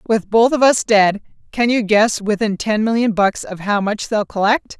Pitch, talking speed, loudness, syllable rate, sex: 215 Hz, 215 wpm, -16 LUFS, 4.6 syllables/s, female